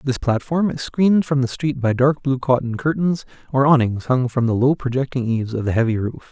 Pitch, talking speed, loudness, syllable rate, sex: 130 Hz, 230 wpm, -19 LUFS, 5.6 syllables/s, male